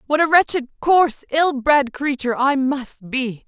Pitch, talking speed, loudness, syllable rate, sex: 275 Hz, 175 wpm, -18 LUFS, 4.3 syllables/s, female